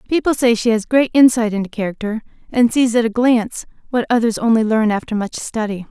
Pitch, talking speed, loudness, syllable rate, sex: 230 Hz, 205 wpm, -17 LUFS, 5.9 syllables/s, female